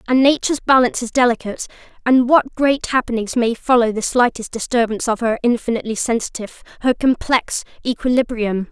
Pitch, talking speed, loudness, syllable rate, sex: 240 Hz, 145 wpm, -18 LUFS, 6.0 syllables/s, female